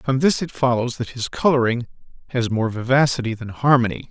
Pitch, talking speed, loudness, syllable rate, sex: 125 Hz, 175 wpm, -20 LUFS, 5.6 syllables/s, male